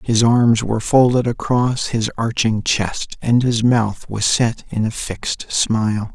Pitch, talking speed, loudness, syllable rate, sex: 115 Hz, 165 wpm, -18 LUFS, 3.9 syllables/s, male